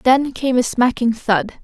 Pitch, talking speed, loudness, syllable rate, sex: 240 Hz, 185 wpm, -17 LUFS, 4.2 syllables/s, female